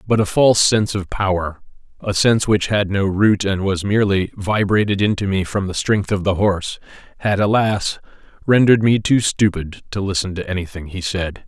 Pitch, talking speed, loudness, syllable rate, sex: 100 Hz, 190 wpm, -18 LUFS, 5.4 syllables/s, male